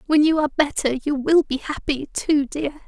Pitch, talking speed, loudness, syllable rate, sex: 290 Hz, 210 wpm, -21 LUFS, 4.9 syllables/s, female